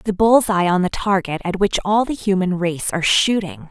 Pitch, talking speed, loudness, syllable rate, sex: 190 Hz, 225 wpm, -18 LUFS, 5.2 syllables/s, female